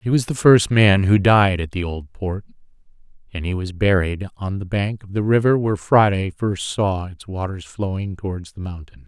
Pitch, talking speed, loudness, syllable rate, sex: 100 Hz, 205 wpm, -19 LUFS, 4.9 syllables/s, male